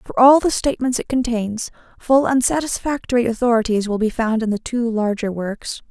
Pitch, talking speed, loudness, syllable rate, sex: 235 Hz, 185 wpm, -19 LUFS, 5.3 syllables/s, female